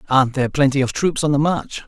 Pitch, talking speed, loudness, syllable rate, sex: 140 Hz, 255 wpm, -18 LUFS, 6.7 syllables/s, male